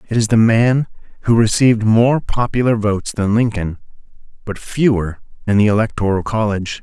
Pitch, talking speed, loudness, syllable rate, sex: 110 Hz, 150 wpm, -16 LUFS, 5.3 syllables/s, male